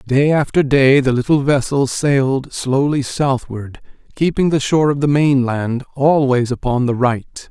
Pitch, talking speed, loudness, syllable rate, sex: 135 Hz, 150 wpm, -16 LUFS, 4.3 syllables/s, male